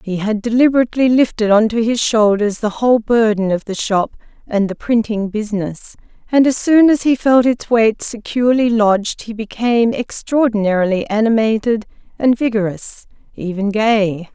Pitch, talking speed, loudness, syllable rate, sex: 225 Hz, 150 wpm, -15 LUFS, 5.0 syllables/s, female